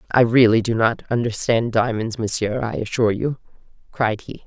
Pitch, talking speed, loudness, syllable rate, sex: 115 Hz, 160 wpm, -20 LUFS, 5.2 syllables/s, female